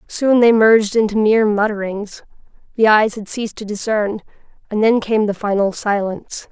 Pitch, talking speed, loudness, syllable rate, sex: 215 Hz, 165 wpm, -16 LUFS, 5.2 syllables/s, female